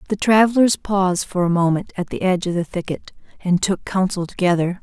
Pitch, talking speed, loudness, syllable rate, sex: 185 Hz, 200 wpm, -19 LUFS, 5.8 syllables/s, female